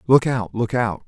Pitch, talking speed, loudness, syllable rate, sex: 115 Hz, 170 wpm, -20 LUFS, 4.6 syllables/s, male